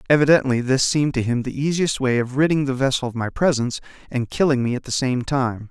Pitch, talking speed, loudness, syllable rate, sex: 130 Hz, 230 wpm, -20 LUFS, 6.1 syllables/s, male